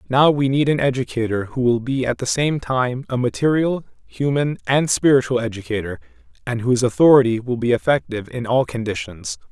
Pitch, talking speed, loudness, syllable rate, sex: 125 Hz, 170 wpm, -19 LUFS, 5.6 syllables/s, male